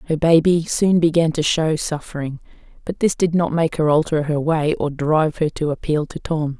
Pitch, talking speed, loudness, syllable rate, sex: 155 Hz, 210 wpm, -19 LUFS, 5.0 syllables/s, female